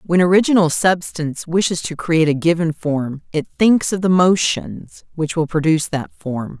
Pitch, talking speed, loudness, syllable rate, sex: 165 Hz, 175 wpm, -17 LUFS, 4.8 syllables/s, female